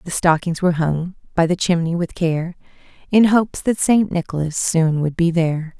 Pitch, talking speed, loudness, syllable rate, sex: 170 Hz, 185 wpm, -18 LUFS, 5.1 syllables/s, female